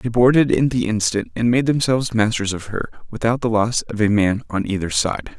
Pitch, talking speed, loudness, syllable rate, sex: 115 Hz, 225 wpm, -19 LUFS, 5.4 syllables/s, male